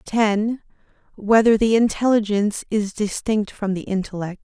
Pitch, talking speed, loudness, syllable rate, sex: 210 Hz, 120 wpm, -20 LUFS, 5.1 syllables/s, female